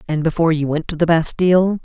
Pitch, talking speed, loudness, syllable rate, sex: 165 Hz, 230 wpm, -17 LUFS, 6.6 syllables/s, female